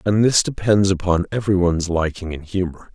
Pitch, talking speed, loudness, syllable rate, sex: 95 Hz, 185 wpm, -19 LUFS, 5.7 syllables/s, male